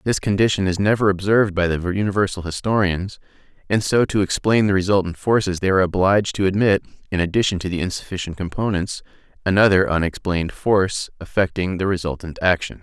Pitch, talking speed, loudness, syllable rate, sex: 95 Hz, 160 wpm, -20 LUFS, 6.1 syllables/s, male